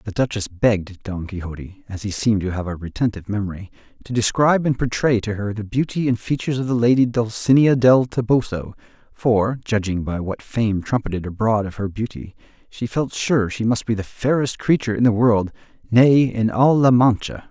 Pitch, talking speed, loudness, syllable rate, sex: 110 Hz, 190 wpm, -20 LUFS, 5.4 syllables/s, male